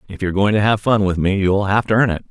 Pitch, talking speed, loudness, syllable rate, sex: 100 Hz, 340 wpm, -17 LUFS, 6.7 syllables/s, male